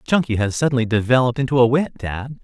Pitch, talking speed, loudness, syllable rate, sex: 125 Hz, 195 wpm, -19 LUFS, 6.9 syllables/s, male